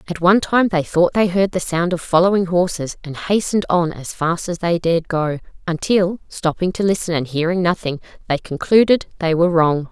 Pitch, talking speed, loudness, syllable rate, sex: 175 Hz, 200 wpm, -18 LUFS, 5.4 syllables/s, female